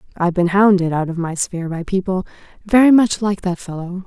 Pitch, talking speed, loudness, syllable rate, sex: 185 Hz, 205 wpm, -17 LUFS, 6.0 syllables/s, female